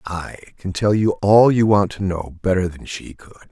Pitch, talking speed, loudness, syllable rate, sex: 95 Hz, 220 wpm, -18 LUFS, 4.7 syllables/s, male